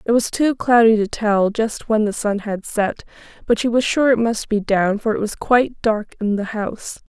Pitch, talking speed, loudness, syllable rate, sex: 220 Hz, 235 wpm, -19 LUFS, 4.9 syllables/s, female